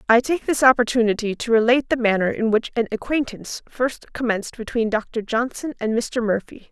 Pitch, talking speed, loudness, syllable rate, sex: 235 Hz, 180 wpm, -21 LUFS, 5.5 syllables/s, female